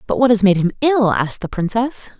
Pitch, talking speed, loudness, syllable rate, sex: 215 Hz, 245 wpm, -16 LUFS, 5.8 syllables/s, female